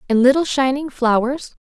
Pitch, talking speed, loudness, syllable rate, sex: 260 Hz, 145 wpm, -17 LUFS, 5.0 syllables/s, female